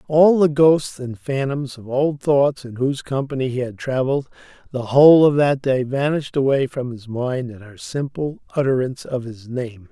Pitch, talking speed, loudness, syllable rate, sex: 135 Hz, 190 wpm, -19 LUFS, 4.9 syllables/s, male